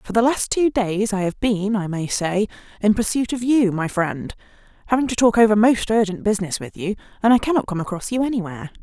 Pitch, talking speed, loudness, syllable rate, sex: 210 Hz, 225 wpm, -20 LUFS, 5.9 syllables/s, female